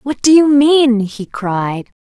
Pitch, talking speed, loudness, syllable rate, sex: 245 Hz, 175 wpm, -13 LUFS, 3.2 syllables/s, female